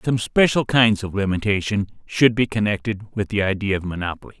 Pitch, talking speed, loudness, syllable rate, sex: 105 Hz, 175 wpm, -20 LUFS, 5.7 syllables/s, male